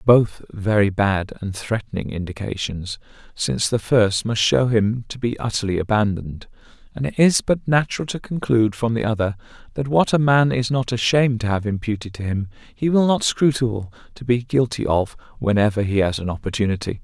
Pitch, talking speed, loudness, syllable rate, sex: 115 Hz, 180 wpm, -20 LUFS, 5.4 syllables/s, male